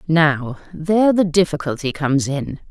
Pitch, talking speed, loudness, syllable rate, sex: 160 Hz, 135 wpm, -18 LUFS, 4.7 syllables/s, female